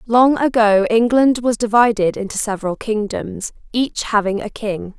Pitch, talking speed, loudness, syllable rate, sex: 215 Hz, 145 wpm, -17 LUFS, 4.6 syllables/s, female